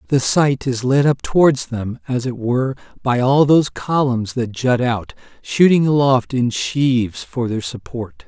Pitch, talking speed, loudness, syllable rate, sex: 130 Hz, 175 wpm, -17 LUFS, 4.3 syllables/s, male